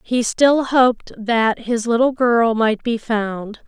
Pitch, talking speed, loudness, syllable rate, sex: 230 Hz, 165 wpm, -17 LUFS, 3.4 syllables/s, female